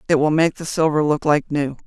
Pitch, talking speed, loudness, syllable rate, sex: 150 Hz, 255 wpm, -19 LUFS, 5.6 syllables/s, female